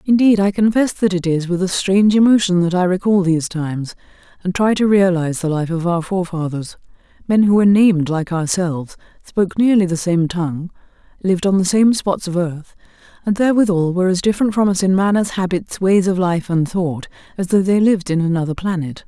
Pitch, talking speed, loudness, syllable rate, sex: 185 Hz, 200 wpm, -17 LUFS, 5.9 syllables/s, female